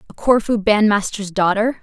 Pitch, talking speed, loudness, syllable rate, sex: 210 Hz, 130 wpm, -17 LUFS, 4.9 syllables/s, female